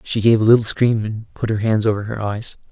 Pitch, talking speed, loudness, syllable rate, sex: 110 Hz, 265 wpm, -18 LUFS, 5.6 syllables/s, male